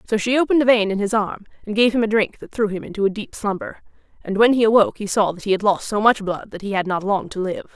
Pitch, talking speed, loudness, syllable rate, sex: 210 Hz, 300 wpm, -20 LUFS, 6.6 syllables/s, female